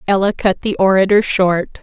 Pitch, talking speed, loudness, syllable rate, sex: 195 Hz, 165 wpm, -14 LUFS, 4.8 syllables/s, female